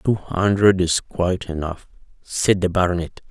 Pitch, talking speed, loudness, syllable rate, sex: 90 Hz, 145 wpm, -20 LUFS, 4.6 syllables/s, male